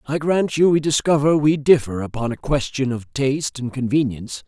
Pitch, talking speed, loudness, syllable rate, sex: 135 Hz, 190 wpm, -19 LUFS, 5.3 syllables/s, male